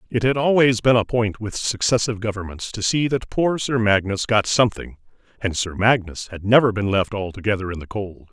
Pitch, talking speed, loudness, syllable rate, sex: 110 Hz, 200 wpm, -20 LUFS, 5.5 syllables/s, male